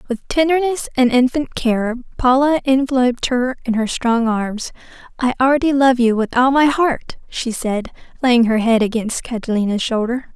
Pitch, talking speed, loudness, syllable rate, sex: 250 Hz, 160 wpm, -17 LUFS, 5.0 syllables/s, female